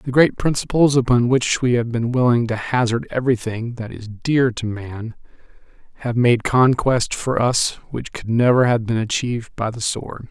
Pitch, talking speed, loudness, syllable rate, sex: 120 Hz, 180 wpm, -19 LUFS, 4.6 syllables/s, male